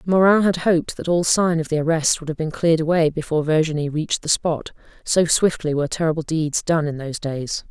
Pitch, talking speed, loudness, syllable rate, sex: 160 Hz, 210 wpm, -20 LUFS, 5.9 syllables/s, female